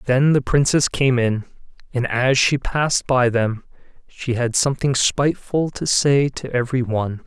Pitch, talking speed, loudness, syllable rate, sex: 130 Hz, 165 wpm, -19 LUFS, 4.7 syllables/s, male